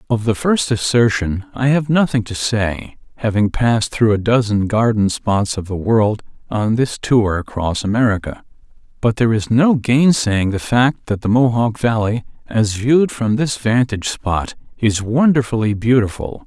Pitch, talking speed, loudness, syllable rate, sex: 115 Hz, 160 wpm, -17 LUFS, 4.5 syllables/s, male